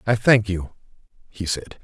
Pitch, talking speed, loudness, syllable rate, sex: 100 Hz, 165 wpm, -21 LUFS, 4.4 syllables/s, male